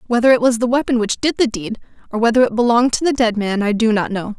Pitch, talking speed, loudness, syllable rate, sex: 230 Hz, 285 wpm, -16 LUFS, 6.7 syllables/s, female